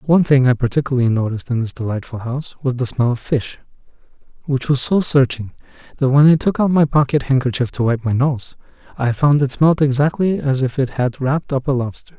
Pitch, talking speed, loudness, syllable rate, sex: 135 Hz, 210 wpm, -17 LUFS, 5.9 syllables/s, male